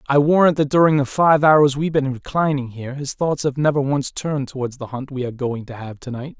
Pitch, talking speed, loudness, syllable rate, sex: 140 Hz, 255 wpm, -19 LUFS, 6.0 syllables/s, male